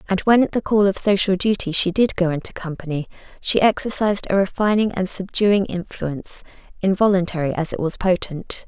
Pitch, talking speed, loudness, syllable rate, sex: 190 Hz, 175 wpm, -20 LUFS, 5.5 syllables/s, female